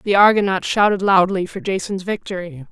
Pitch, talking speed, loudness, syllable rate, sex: 190 Hz, 155 wpm, -18 LUFS, 5.3 syllables/s, female